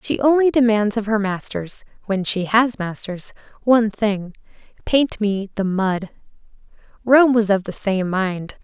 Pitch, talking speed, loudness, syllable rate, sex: 210 Hz, 140 wpm, -19 LUFS, 4.2 syllables/s, female